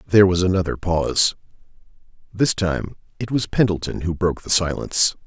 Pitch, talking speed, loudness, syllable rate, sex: 95 Hz, 150 wpm, -20 LUFS, 5.9 syllables/s, male